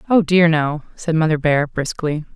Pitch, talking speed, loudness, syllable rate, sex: 160 Hz, 180 wpm, -18 LUFS, 4.6 syllables/s, female